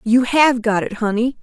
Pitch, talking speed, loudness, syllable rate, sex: 235 Hz, 210 wpm, -17 LUFS, 4.6 syllables/s, female